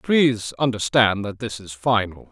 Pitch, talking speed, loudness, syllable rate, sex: 110 Hz, 155 wpm, -21 LUFS, 4.5 syllables/s, male